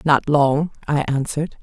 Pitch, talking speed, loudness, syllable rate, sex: 145 Hz, 150 wpm, -19 LUFS, 4.5 syllables/s, female